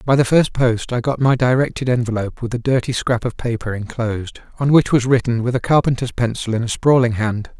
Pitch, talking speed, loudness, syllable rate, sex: 120 Hz, 220 wpm, -18 LUFS, 5.8 syllables/s, male